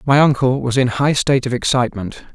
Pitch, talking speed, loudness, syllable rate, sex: 130 Hz, 205 wpm, -16 LUFS, 6.1 syllables/s, male